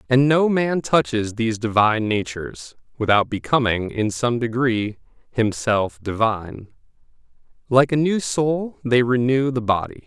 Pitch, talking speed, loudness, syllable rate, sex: 120 Hz, 130 wpm, -20 LUFS, 4.5 syllables/s, male